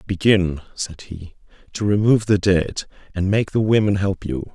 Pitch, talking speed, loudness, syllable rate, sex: 95 Hz, 170 wpm, -20 LUFS, 4.6 syllables/s, male